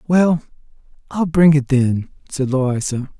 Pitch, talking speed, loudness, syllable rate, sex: 145 Hz, 130 wpm, -17 LUFS, 3.8 syllables/s, male